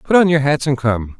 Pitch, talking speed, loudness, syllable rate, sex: 140 Hz, 300 wpm, -16 LUFS, 5.5 syllables/s, male